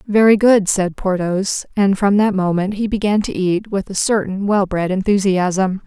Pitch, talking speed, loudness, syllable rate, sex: 195 Hz, 185 wpm, -17 LUFS, 4.4 syllables/s, female